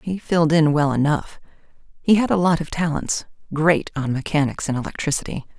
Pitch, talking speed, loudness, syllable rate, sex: 160 Hz, 150 wpm, -20 LUFS, 5.5 syllables/s, female